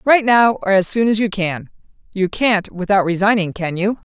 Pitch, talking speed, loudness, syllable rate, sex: 200 Hz, 205 wpm, -16 LUFS, 4.9 syllables/s, female